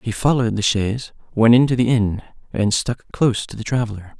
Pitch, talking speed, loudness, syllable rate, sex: 115 Hz, 200 wpm, -19 LUFS, 6.0 syllables/s, male